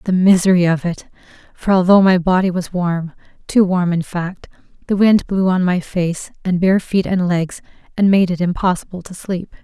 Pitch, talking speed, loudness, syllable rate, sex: 180 Hz, 180 wpm, -16 LUFS, 4.9 syllables/s, female